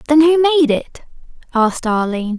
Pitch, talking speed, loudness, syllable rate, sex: 265 Hz, 150 wpm, -15 LUFS, 5.7 syllables/s, female